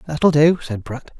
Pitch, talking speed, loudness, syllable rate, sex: 145 Hz, 200 wpm, -17 LUFS, 4.2 syllables/s, male